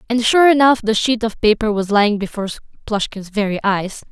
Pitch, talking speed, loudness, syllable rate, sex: 220 Hz, 190 wpm, -17 LUFS, 5.8 syllables/s, female